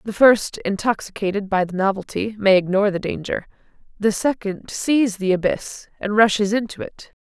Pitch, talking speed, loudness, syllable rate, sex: 205 Hz, 160 wpm, -20 LUFS, 5.0 syllables/s, female